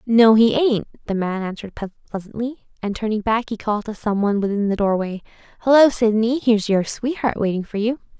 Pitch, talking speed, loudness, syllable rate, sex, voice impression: 220 Hz, 190 wpm, -20 LUFS, 5.6 syllables/s, female, feminine, slightly young, slightly fluent, cute, friendly, slightly kind